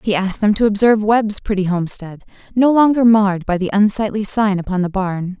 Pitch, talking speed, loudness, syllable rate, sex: 205 Hz, 200 wpm, -16 LUFS, 5.9 syllables/s, female